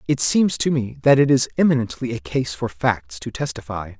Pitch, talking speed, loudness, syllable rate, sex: 125 Hz, 210 wpm, -20 LUFS, 5.2 syllables/s, male